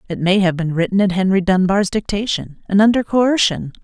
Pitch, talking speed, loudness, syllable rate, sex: 195 Hz, 190 wpm, -16 LUFS, 5.4 syllables/s, female